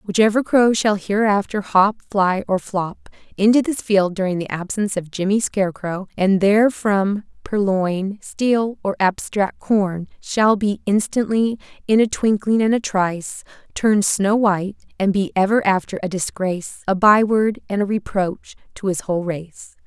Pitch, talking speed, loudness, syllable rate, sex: 200 Hz, 155 wpm, -19 LUFS, 4.5 syllables/s, female